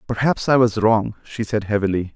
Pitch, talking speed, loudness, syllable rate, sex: 110 Hz, 195 wpm, -19 LUFS, 5.3 syllables/s, male